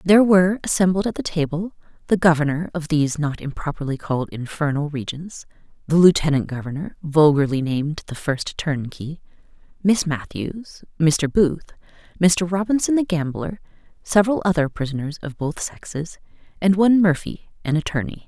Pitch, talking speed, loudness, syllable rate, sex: 165 Hz, 140 wpm, -21 LUFS, 4.8 syllables/s, female